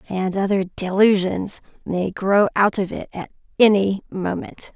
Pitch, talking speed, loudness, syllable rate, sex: 195 Hz, 140 wpm, -20 LUFS, 4.1 syllables/s, female